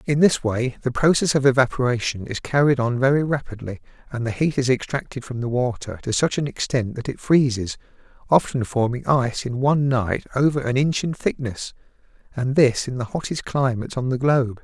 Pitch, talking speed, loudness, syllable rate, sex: 130 Hz, 195 wpm, -21 LUFS, 5.5 syllables/s, male